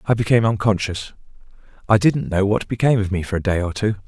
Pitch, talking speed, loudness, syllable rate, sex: 105 Hz, 220 wpm, -19 LUFS, 6.8 syllables/s, male